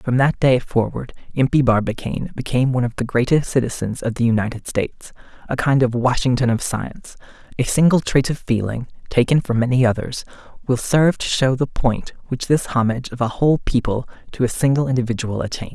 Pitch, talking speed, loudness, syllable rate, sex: 125 Hz, 185 wpm, -19 LUFS, 6.0 syllables/s, male